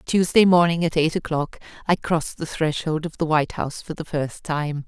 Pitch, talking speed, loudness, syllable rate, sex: 160 Hz, 210 wpm, -22 LUFS, 5.4 syllables/s, female